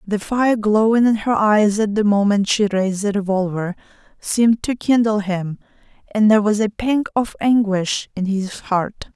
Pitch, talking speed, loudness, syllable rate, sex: 210 Hz, 175 wpm, -18 LUFS, 4.6 syllables/s, female